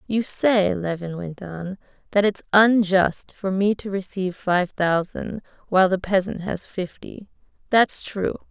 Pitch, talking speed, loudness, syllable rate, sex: 190 Hz, 150 wpm, -22 LUFS, 4.1 syllables/s, female